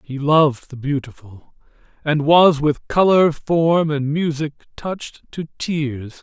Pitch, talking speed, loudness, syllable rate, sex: 150 Hz, 135 wpm, -18 LUFS, 3.8 syllables/s, male